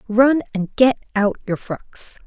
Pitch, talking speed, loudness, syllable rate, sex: 225 Hz, 160 wpm, -19 LUFS, 3.7 syllables/s, female